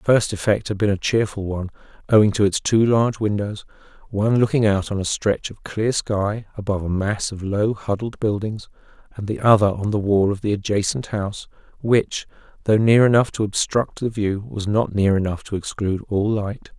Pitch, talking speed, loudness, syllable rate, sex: 105 Hz, 200 wpm, -21 LUFS, 5.6 syllables/s, male